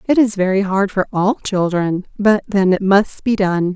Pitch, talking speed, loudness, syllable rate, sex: 195 Hz, 210 wpm, -16 LUFS, 4.4 syllables/s, female